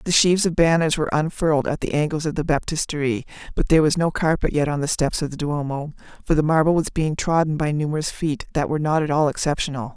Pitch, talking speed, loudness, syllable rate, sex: 155 Hz, 235 wpm, -21 LUFS, 6.5 syllables/s, female